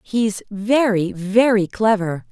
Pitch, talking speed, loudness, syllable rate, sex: 210 Hz, 105 wpm, -18 LUFS, 3.3 syllables/s, female